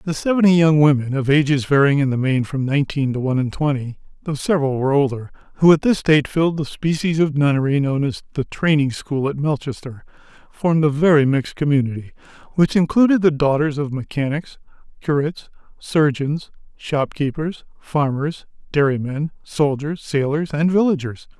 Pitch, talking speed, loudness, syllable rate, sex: 145 Hz, 160 wpm, -19 LUFS, 5.5 syllables/s, male